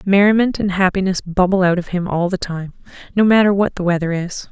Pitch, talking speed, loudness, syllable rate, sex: 190 Hz, 215 wpm, -17 LUFS, 5.8 syllables/s, female